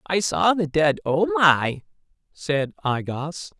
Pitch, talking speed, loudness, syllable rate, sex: 150 Hz, 150 wpm, -22 LUFS, 3.3 syllables/s, male